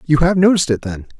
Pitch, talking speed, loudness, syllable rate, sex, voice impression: 150 Hz, 250 wpm, -15 LUFS, 7.1 syllables/s, male, very masculine, old, very thick, slightly tensed, slightly weak, slightly bright, soft, slightly clear, fluent, slightly raspy, slightly cool, intellectual, slightly refreshing, sincere, slightly calm, very mature, slightly friendly, slightly reassuring, slightly unique, slightly elegant, wild, slightly sweet, lively, kind, modest